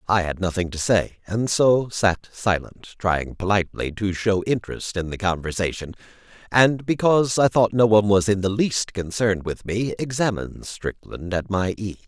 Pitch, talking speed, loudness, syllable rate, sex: 100 Hz, 175 wpm, -22 LUFS, 4.9 syllables/s, male